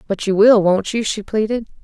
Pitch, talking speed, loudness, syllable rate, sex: 210 Hz, 230 wpm, -16 LUFS, 5.2 syllables/s, female